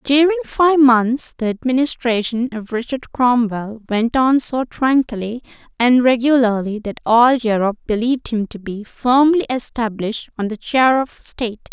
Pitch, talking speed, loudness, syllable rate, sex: 240 Hz, 145 wpm, -17 LUFS, 4.6 syllables/s, female